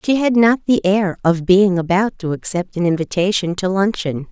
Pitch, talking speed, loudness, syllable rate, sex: 190 Hz, 195 wpm, -17 LUFS, 5.0 syllables/s, female